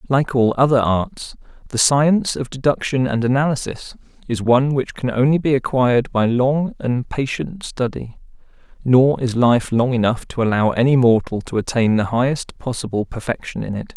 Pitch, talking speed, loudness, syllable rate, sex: 125 Hz, 170 wpm, -18 LUFS, 5.0 syllables/s, male